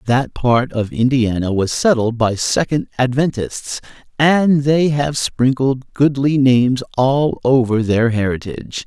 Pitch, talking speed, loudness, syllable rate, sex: 130 Hz, 130 wpm, -16 LUFS, 4.0 syllables/s, male